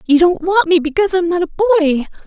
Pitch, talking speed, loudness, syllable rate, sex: 325 Hz, 240 wpm, -14 LUFS, 7.3 syllables/s, female